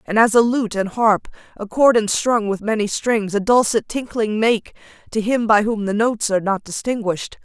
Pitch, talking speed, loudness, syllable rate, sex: 215 Hz, 195 wpm, -18 LUFS, 5.1 syllables/s, female